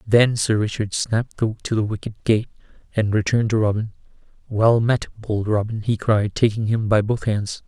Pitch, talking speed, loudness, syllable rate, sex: 110 Hz, 180 wpm, -21 LUFS, 5.0 syllables/s, male